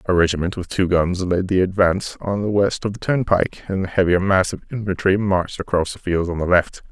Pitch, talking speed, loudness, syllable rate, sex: 95 Hz, 235 wpm, -20 LUFS, 5.8 syllables/s, male